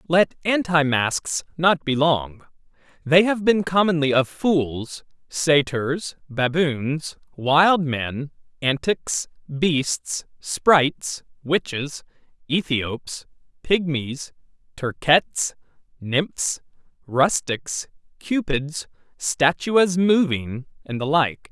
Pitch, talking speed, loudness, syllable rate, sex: 150 Hz, 85 wpm, -21 LUFS, 2.9 syllables/s, male